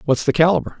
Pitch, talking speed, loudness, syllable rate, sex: 145 Hz, 225 wpm, -17 LUFS, 7.7 syllables/s, male